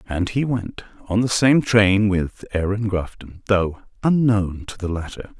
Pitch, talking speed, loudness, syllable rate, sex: 100 Hz, 165 wpm, -20 LUFS, 4.2 syllables/s, male